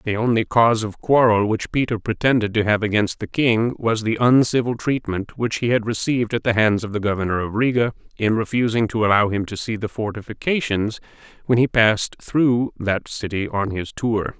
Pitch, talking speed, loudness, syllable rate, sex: 110 Hz, 195 wpm, -20 LUFS, 5.2 syllables/s, male